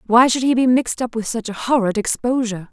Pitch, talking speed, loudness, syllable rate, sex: 235 Hz, 245 wpm, -18 LUFS, 6.3 syllables/s, female